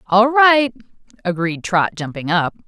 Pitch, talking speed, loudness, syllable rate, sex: 205 Hz, 135 wpm, -17 LUFS, 4.2 syllables/s, female